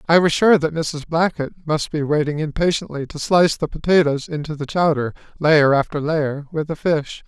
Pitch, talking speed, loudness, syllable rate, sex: 155 Hz, 190 wpm, -19 LUFS, 5.2 syllables/s, male